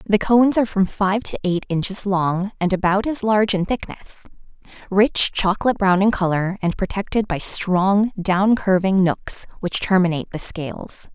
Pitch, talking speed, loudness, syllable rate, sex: 195 Hz, 165 wpm, -20 LUFS, 5.0 syllables/s, female